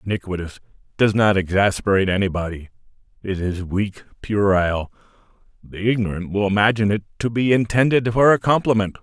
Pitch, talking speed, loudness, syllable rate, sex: 100 Hz, 125 wpm, -20 LUFS, 5.9 syllables/s, male